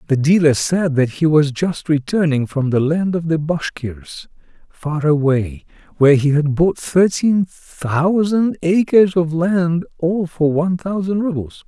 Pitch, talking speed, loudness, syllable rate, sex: 160 Hz, 155 wpm, -17 LUFS, 4.0 syllables/s, male